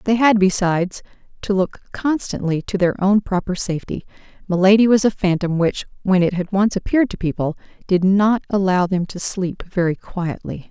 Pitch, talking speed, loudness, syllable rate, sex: 190 Hz, 175 wpm, -19 LUFS, 5.2 syllables/s, female